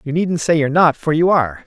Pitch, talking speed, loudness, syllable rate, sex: 155 Hz, 290 wpm, -16 LUFS, 6.4 syllables/s, male